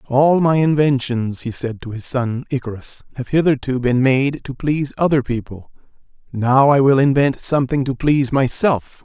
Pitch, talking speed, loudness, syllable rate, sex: 135 Hz, 165 wpm, -17 LUFS, 4.9 syllables/s, male